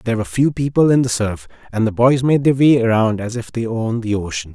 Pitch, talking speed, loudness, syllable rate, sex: 115 Hz, 265 wpm, -17 LUFS, 6.2 syllables/s, male